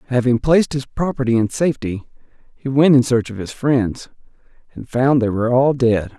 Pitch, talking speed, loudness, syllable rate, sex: 125 Hz, 185 wpm, -17 LUFS, 5.3 syllables/s, male